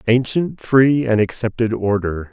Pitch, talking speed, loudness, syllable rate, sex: 115 Hz, 130 wpm, -18 LUFS, 4.2 syllables/s, male